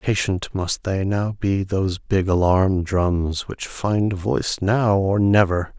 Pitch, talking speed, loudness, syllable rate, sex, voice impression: 95 Hz, 165 wpm, -21 LUFS, 3.8 syllables/s, male, very masculine, very adult-like, old, very thick, relaxed, very powerful, dark, slightly soft, muffled, fluent, raspy, very cool, intellectual, very sincere, very calm, very mature, friendly, very reassuring, very unique, slightly elegant, very wild, slightly sweet, very kind, very modest